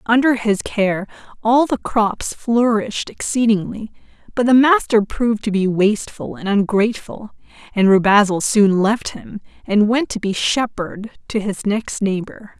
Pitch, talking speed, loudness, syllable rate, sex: 215 Hz, 150 wpm, -18 LUFS, 4.4 syllables/s, female